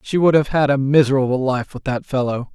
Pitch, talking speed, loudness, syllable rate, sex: 135 Hz, 235 wpm, -18 LUFS, 5.7 syllables/s, male